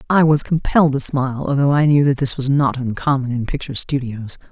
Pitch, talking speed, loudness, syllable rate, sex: 140 Hz, 215 wpm, -17 LUFS, 6.0 syllables/s, female